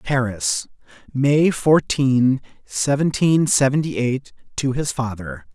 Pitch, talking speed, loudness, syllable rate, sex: 135 Hz, 95 wpm, -19 LUFS, 3.5 syllables/s, male